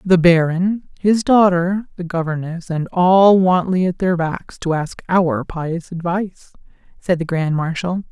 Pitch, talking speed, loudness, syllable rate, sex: 175 Hz, 155 wpm, -17 LUFS, 4.0 syllables/s, female